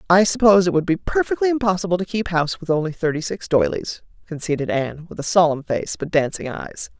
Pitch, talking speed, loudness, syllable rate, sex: 175 Hz, 205 wpm, -20 LUFS, 6.2 syllables/s, female